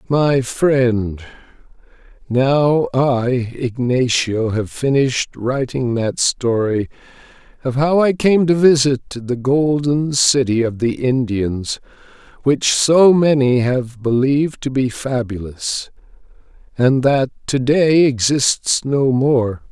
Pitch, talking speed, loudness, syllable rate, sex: 130 Hz, 115 wpm, -16 LUFS, 3.3 syllables/s, male